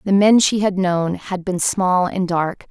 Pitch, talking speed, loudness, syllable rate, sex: 185 Hz, 220 wpm, -18 LUFS, 3.9 syllables/s, female